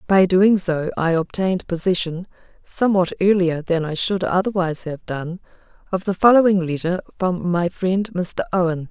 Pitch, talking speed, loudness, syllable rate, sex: 180 Hz, 155 wpm, -20 LUFS, 5.0 syllables/s, female